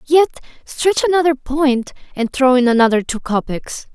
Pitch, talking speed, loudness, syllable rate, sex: 270 Hz, 150 wpm, -16 LUFS, 4.9 syllables/s, female